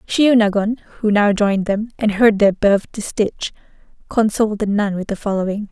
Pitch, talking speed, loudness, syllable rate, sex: 210 Hz, 170 wpm, -17 LUFS, 5.3 syllables/s, female